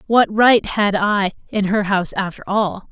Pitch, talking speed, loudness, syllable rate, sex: 200 Hz, 185 wpm, -17 LUFS, 4.5 syllables/s, female